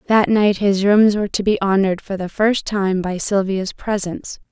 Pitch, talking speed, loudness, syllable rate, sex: 200 Hz, 200 wpm, -18 LUFS, 5.0 syllables/s, female